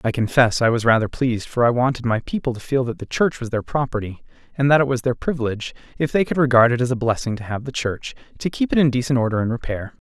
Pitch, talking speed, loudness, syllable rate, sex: 125 Hz, 270 wpm, -20 LUFS, 6.6 syllables/s, male